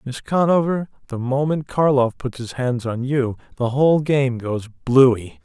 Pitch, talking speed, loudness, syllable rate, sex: 130 Hz, 165 wpm, -20 LUFS, 4.2 syllables/s, male